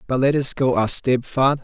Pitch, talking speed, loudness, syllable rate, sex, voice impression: 130 Hz, 255 wpm, -19 LUFS, 5.4 syllables/s, male, masculine, slightly gender-neutral, slightly young, adult-like, slightly thick, slightly relaxed, slightly weak, bright, slightly soft, clear, fluent, cool, intellectual, refreshing, slightly sincere, calm, slightly mature, friendly, reassuring, slightly unique, elegant, slightly wild, sweet, very lively, very kind, modest, slightly light